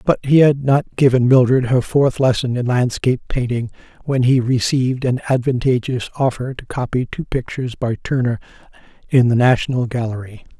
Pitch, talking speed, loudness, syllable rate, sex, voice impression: 125 Hz, 160 wpm, -17 LUFS, 5.3 syllables/s, male, masculine, middle-aged, relaxed, weak, slightly dark, slightly soft, raspy, calm, mature, slightly friendly, wild, kind, modest